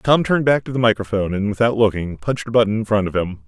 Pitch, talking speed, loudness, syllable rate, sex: 110 Hz, 275 wpm, -19 LUFS, 7.1 syllables/s, male